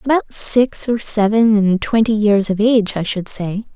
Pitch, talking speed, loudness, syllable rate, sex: 215 Hz, 190 wpm, -16 LUFS, 4.5 syllables/s, female